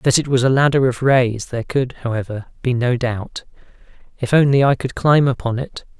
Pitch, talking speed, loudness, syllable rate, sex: 125 Hz, 200 wpm, -18 LUFS, 5.2 syllables/s, male